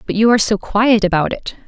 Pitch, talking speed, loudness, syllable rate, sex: 210 Hz, 250 wpm, -15 LUFS, 6.2 syllables/s, female